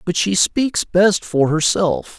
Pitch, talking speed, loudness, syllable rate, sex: 185 Hz, 165 wpm, -17 LUFS, 3.4 syllables/s, male